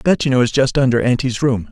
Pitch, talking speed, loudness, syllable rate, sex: 125 Hz, 280 wpm, -16 LUFS, 6.3 syllables/s, male